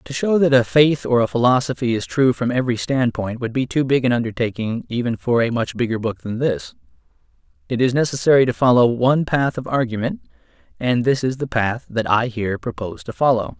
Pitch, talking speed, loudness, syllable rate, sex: 125 Hz, 205 wpm, -19 LUFS, 5.8 syllables/s, male